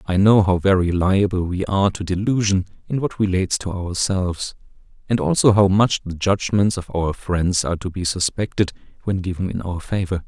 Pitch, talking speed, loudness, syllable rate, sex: 95 Hz, 185 wpm, -20 LUFS, 5.3 syllables/s, male